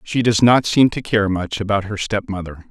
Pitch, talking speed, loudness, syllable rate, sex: 105 Hz, 220 wpm, -18 LUFS, 5.2 syllables/s, male